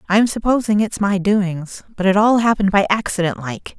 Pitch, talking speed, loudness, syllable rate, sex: 200 Hz, 190 wpm, -17 LUFS, 5.2 syllables/s, female